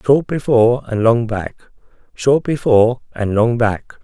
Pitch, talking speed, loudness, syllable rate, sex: 120 Hz, 150 wpm, -16 LUFS, 4.4 syllables/s, male